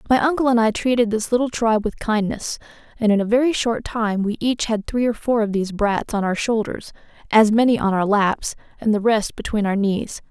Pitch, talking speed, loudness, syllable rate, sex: 220 Hz, 225 wpm, -20 LUFS, 5.4 syllables/s, female